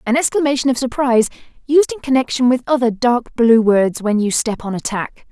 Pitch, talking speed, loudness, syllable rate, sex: 245 Hz, 205 wpm, -16 LUFS, 5.5 syllables/s, female